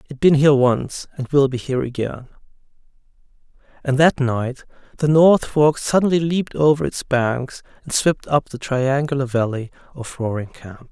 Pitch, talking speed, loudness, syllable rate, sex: 135 Hz, 160 wpm, -19 LUFS, 4.8 syllables/s, male